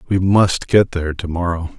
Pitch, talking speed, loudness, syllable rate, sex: 90 Hz, 200 wpm, -17 LUFS, 5.2 syllables/s, male